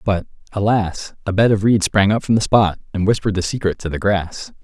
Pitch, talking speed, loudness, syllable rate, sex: 100 Hz, 235 wpm, -18 LUFS, 5.6 syllables/s, male